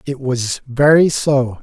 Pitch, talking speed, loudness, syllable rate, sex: 135 Hz, 150 wpm, -15 LUFS, 3.5 syllables/s, male